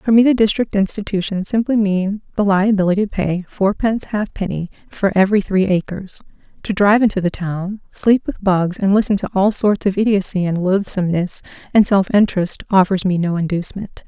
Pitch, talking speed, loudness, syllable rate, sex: 195 Hz, 175 wpm, -17 LUFS, 5.5 syllables/s, female